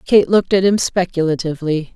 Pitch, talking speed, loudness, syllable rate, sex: 175 Hz, 155 wpm, -16 LUFS, 6.0 syllables/s, female